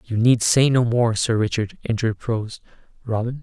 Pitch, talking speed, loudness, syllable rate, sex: 115 Hz, 160 wpm, -20 LUFS, 4.9 syllables/s, male